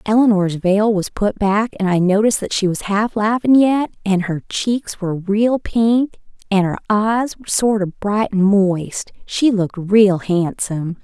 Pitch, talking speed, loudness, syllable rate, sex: 205 Hz, 170 wpm, -17 LUFS, 4.1 syllables/s, female